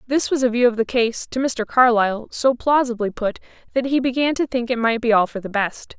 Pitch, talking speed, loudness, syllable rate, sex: 240 Hz, 250 wpm, -20 LUFS, 5.6 syllables/s, female